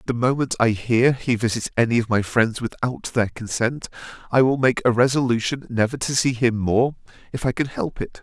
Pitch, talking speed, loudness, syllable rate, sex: 120 Hz, 210 wpm, -21 LUFS, 5.3 syllables/s, male